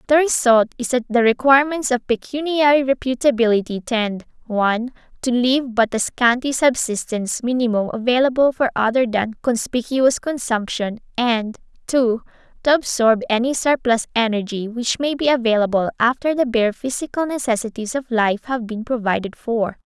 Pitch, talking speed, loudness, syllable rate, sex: 240 Hz, 140 wpm, -19 LUFS, 5.3 syllables/s, female